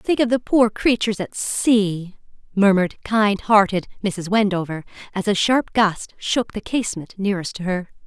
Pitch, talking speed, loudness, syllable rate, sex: 200 Hz, 165 wpm, -20 LUFS, 4.8 syllables/s, female